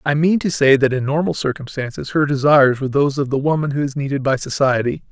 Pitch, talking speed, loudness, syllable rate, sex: 140 Hz, 235 wpm, -17 LUFS, 6.5 syllables/s, male